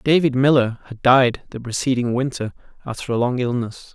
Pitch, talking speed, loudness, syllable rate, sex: 125 Hz, 165 wpm, -20 LUFS, 5.3 syllables/s, male